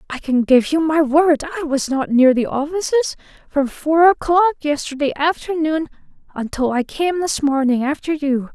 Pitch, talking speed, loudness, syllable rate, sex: 300 Hz, 170 wpm, -18 LUFS, 4.9 syllables/s, female